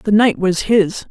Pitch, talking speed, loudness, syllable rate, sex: 200 Hz, 215 wpm, -15 LUFS, 3.9 syllables/s, female